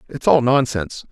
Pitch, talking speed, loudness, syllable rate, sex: 115 Hz, 160 wpm, -18 LUFS, 5.7 syllables/s, male